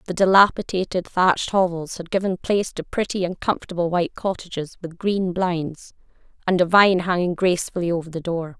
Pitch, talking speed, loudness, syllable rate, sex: 180 Hz, 170 wpm, -21 LUFS, 5.7 syllables/s, female